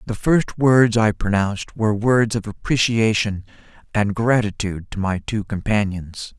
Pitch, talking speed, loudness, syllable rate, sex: 110 Hz, 140 wpm, -20 LUFS, 4.6 syllables/s, male